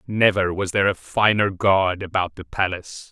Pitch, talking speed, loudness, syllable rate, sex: 95 Hz, 175 wpm, -20 LUFS, 5.1 syllables/s, male